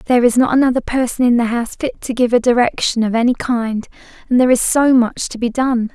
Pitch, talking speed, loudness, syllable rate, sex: 245 Hz, 240 wpm, -15 LUFS, 6.0 syllables/s, female